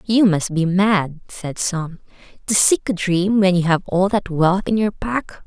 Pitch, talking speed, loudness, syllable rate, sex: 190 Hz, 210 wpm, -18 LUFS, 4.0 syllables/s, female